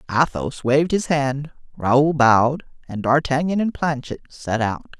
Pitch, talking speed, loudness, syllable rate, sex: 140 Hz, 145 wpm, -20 LUFS, 4.4 syllables/s, male